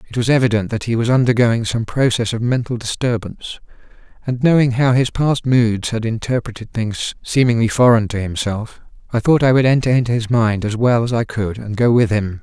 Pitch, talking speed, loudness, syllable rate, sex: 115 Hz, 205 wpm, -17 LUFS, 5.5 syllables/s, male